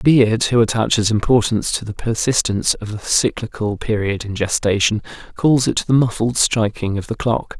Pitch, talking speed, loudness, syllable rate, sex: 110 Hz, 165 wpm, -18 LUFS, 5.0 syllables/s, male